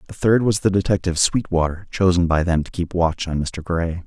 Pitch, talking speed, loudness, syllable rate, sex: 90 Hz, 220 wpm, -20 LUFS, 5.5 syllables/s, male